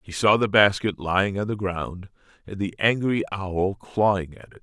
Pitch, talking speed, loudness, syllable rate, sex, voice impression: 100 Hz, 195 wpm, -23 LUFS, 4.8 syllables/s, male, very masculine, very middle-aged, thick, cool, slightly calm, wild